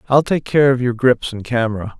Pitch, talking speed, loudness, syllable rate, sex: 125 Hz, 240 wpm, -17 LUFS, 5.5 syllables/s, male